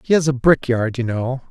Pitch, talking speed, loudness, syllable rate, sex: 130 Hz, 280 wpm, -18 LUFS, 5.2 syllables/s, male